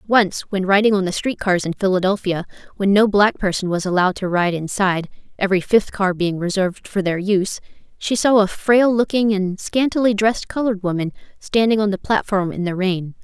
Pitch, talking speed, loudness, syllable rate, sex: 195 Hz, 195 wpm, -19 LUFS, 5.6 syllables/s, female